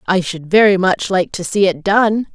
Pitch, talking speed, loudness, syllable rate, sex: 190 Hz, 230 wpm, -15 LUFS, 4.5 syllables/s, female